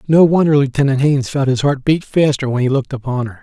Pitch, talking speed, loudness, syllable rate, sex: 140 Hz, 245 wpm, -15 LUFS, 6.4 syllables/s, male